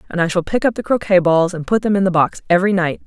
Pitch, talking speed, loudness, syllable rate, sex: 185 Hz, 315 wpm, -16 LUFS, 6.8 syllables/s, female